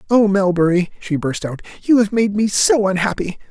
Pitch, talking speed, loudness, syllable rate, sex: 195 Hz, 190 wpm, -17 LUFS, 5.1 syllables/s, male